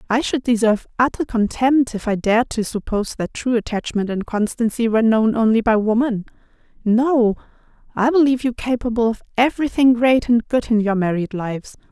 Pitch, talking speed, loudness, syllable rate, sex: 230 Hz, 170 wpm, -19 LUFS, 5.6 syllables/s, female